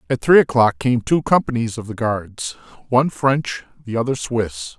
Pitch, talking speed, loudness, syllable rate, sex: 120 Hz, 175 wpm, -19 LUFS, 4.7 syllables/s, male